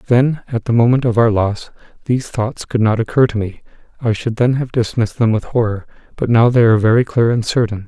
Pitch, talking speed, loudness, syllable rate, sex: 115 Hz, 230 wpm, -16 LUFS, 6.0 syllables/s, male